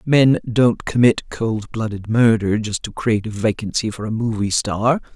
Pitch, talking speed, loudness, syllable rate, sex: 110 Hz, 175 wpm, -19 LUFS, 4.5 syllables/s, female